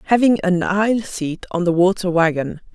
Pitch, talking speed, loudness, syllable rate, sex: 185 Hz, 175 wpm, -18 LUFS, 4.9 syllables/s, female